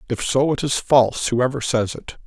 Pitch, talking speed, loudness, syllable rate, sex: 130 Hz, 210 wpm, -19 LUFS, 5.0 syllables/s, male